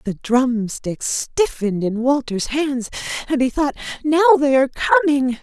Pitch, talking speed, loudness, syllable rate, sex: 265 Hz, 145 wpm, -19 LUFS, 4.3 syllables/s, female